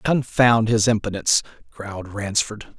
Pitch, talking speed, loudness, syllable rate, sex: 110 Hz, 110 wpm, -20 LUFS, 4.6 syllables/s, male